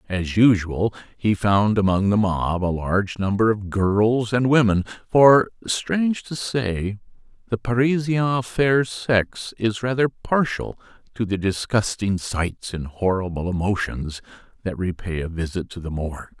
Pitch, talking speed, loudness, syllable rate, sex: 105 Hz, 145 wpm, -22 LUFS, 4.1 syllables/s, male